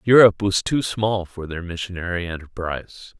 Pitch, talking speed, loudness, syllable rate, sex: 95 Hz, 150 wpm, -22 LUFS, 5.2 syllables/s, male